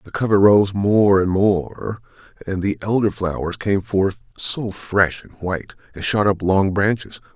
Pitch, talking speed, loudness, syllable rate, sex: 100 Hz, 170 wpm, -19 LUFS, 4.3 syllables/s, male